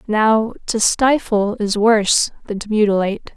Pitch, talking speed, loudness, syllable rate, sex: 215 Hz, 145 wpm, -17 LUFS, 4.4 syllables/s, female